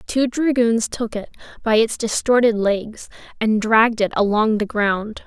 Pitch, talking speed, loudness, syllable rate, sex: 220 Hz, 160 wpm, -19 LUFS, 4.3 syllables/s, female